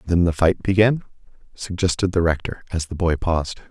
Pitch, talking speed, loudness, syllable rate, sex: 90 Hz, 195 wpm, -21 LUFS, 5.7 syllables/s, male